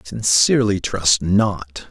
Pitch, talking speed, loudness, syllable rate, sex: 95 Hz, 125 wpm, -17 LUFS, 3.9 syllables/s, male